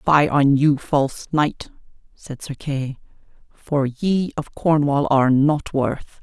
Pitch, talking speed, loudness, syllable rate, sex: 145 Hz, 145 wpm, -20 LUFS, 3.8 syllables/s, female